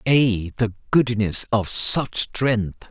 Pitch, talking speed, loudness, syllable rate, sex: 110 Hz, 125 wpm, -20 LUFS, 2.8 syllables/s, male